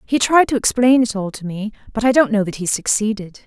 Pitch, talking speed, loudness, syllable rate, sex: 220 Hz, 260 wpm, -17 LUFS, 5.8 syllables/s, female